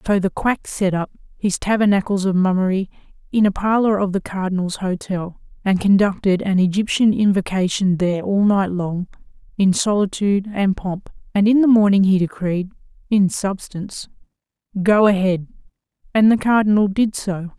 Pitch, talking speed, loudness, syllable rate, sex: 195 Hz, 150 wpm, -18 LUFS, 5.0 syllables/s, female